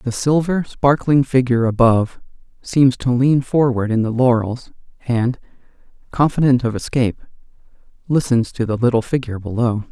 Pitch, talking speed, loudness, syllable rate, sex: 125 Hz, 135 wpm, -17 LUFS, 5.1 syllables/s, male